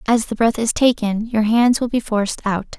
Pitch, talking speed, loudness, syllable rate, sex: 225 Hz, 235 wpm, -18 LUFS, 5.0 syllables/s, female